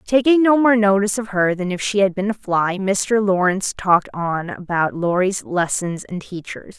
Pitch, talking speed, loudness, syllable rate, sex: 195 Hz, 195 wpm, -18 LUFS, 4.8 syllables/s, female